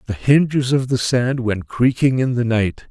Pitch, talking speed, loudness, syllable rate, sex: 125 Hz, 205 wpm, -18 LUFS, 4.5 syllables/s, male